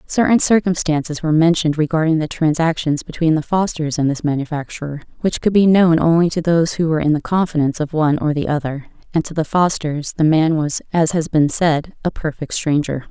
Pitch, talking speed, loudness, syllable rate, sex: 160 Hz, 200 wpm, -17 LUFS, 5.9 syllables/s, female